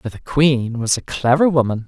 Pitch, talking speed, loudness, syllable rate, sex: 130 Hz, 225 wpm, -17 LUFS, 4.9 syllables/s, male